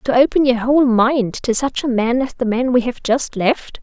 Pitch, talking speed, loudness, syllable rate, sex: 245 Hz, 250 wpm, -17 LUFS, 4.8 syllables/s, female